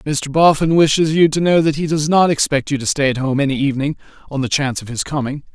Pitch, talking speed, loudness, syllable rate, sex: 145 Hz, 260 wpm, -16 LUFS, 6.3 syllables/s, male